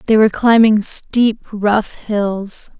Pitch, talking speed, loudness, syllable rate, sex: 215 Hz, 130 wpm, -15 LUFS, 3.1 syllables/s, female